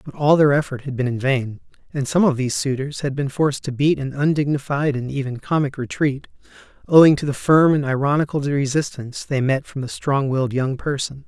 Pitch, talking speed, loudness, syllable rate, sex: 140 Hz, 210 wpm, -20 LUFS, 5.6 syllables/s, male